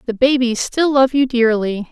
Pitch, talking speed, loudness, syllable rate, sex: 245 Hz, 190 wpm, -16 LUFS, 4.5 syllables/s, female